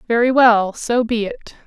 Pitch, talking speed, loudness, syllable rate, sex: 240 Hz, 180 wpm, -16 LUFS, 4.8 syllables/s, female